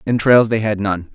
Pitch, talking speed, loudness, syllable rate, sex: 110 Hz, 210 wpm, -15 LUFS, 5.0 syllables/s, male